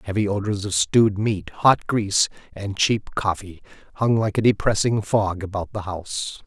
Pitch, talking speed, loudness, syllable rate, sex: 100 Hz, 165 wpm, -22 LUFS, 4.8 syllables/s, male